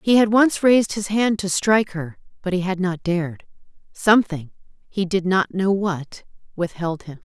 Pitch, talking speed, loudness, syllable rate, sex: 190 Hz, 165 wpm, -20 LUFS, 4.9 syllables/s, female